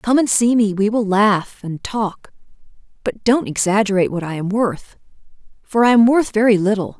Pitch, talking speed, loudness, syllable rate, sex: 215 Hz, 190 wpm, -17 LUFS, 5.0 syllables/s, female